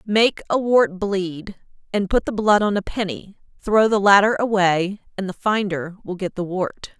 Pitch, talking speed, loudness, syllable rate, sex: 195 Hz, 190 wpm, -20 LUFS, 4.5 syllables/s, female